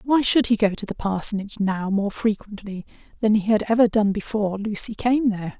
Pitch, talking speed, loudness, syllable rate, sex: 210 Hz, 205 wpm, -21 LUFS, 5.7 syllables/s, female